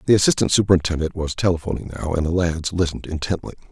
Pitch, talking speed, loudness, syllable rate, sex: 85 Hz, 180 wpm, -21 LUFS, 7.2 syllables/s, male